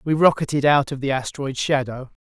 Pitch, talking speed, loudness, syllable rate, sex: 140 Hz, 190 wpm, -20 LUFS, 5.9 syllables/s, male